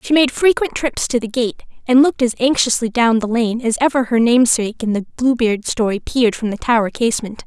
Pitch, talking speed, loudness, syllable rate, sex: 240 Hz, 215 wpm, -16 LUFS, 5.9 syllables/s, female